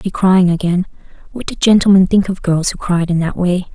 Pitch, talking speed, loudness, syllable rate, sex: 185 Hz, 225 wpm, -14 LUFS, 5.6 syllables/s, female